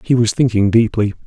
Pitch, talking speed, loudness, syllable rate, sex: 110 Hz, 190 wpm, -15 LUFS, 5.7 syllables/s, male